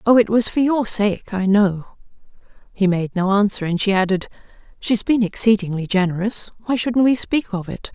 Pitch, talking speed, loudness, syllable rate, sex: 205 Hz, 180 wpm, -19 LUFS, 5.0 syllables/s, female